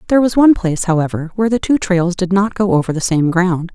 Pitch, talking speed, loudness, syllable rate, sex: 190 Hz, 255 wpm, -15 LUFS, 6.6 syllables/s, female